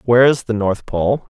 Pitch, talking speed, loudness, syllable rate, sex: 115 Hz, 220 wpm, -17 LUFS, 5.2 syllables/s, male